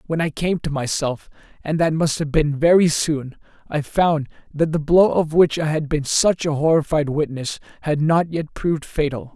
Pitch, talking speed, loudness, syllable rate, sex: 155 Hz, 200 wpm, -20 LUFS, 4.7 syllables/s, male